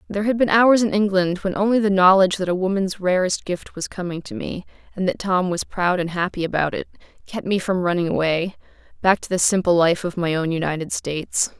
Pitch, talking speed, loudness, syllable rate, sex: 185 Hz, 215 wpm, -20 LUFS, 5.8 syllables/s, female